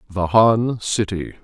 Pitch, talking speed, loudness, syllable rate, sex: 105 Hz, 125 wpm, -18 LUFS, 4.2 syllables/s, male